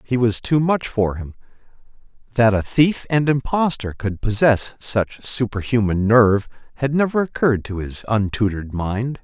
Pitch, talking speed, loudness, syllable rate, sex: 115 Hz, 150 wpm, -19 LUFS, 4.7 syllables/s, male